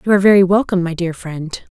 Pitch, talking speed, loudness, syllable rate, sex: 180 Hz, 240 wpm, -15 LUFS, 7.0 syllables/s, female